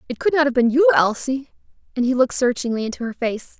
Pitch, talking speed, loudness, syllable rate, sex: 250 Hz, 235 wpm, -19 LUFS, 6.6 syllables/s, female